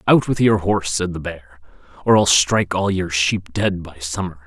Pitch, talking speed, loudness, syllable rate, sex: 90 Hz, 215 wpm, -18 LUFS, 5.0 syllables/s, male